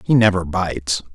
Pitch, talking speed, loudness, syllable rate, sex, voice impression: 90 Hz, 160 wpm, -19 LUFS, 5.2 syllables/s, male, masculine, adult-like, tensed, powerful, slightly bright, clear, slightly halting, intellectual, friendly, reassuring, wild, lively, kind